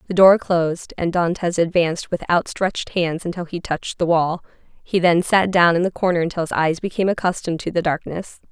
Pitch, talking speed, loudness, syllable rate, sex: 175 Hz, 205 wpm, -19 LUFS, 5.8 syllables/s, female